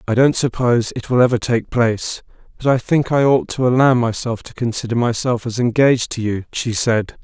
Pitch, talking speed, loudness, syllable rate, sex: 120 Hz, 205 wpm, -17 LUFS, 5.4 syllables/s, male